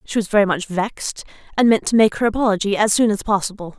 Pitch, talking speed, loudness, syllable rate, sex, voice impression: 205 Hz, 240 wpm, -18 LUFS, 6.6 syllables/s, female, feminine, slightly adult-like, tensed, clear